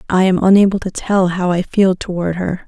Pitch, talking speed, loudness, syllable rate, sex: 185 Hz, 225 wpm, -15 LUFS, 5.3 syllables/s, female